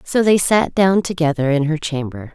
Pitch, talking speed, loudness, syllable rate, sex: 160 Hz, 205 wpm, -17 LUFS, 4.9 syllables/s, female